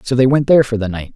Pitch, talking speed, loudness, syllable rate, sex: 120 Hz, 365 wpm, -14 LUFS, 7.6 syllables/s, male